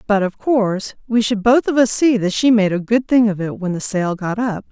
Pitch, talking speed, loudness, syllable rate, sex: 215 Hz, 280 wpm, -17 LUFS, 5.2 syllables/s, female